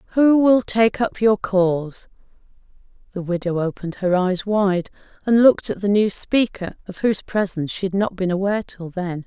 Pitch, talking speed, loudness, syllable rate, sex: 195 Hz, 180 wpm, -20 LUFS, 5.2 syllables/s, female